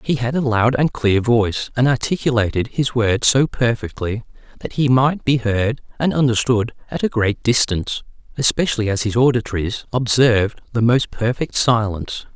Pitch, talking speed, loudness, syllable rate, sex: 120 Hz, 160 wpm, -18 LUFS, 5.0 syllables/s, male